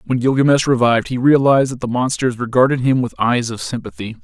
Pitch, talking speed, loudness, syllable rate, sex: 125 Hz, 200 wpm, -16 LUFS, 6.2 syllables/s, male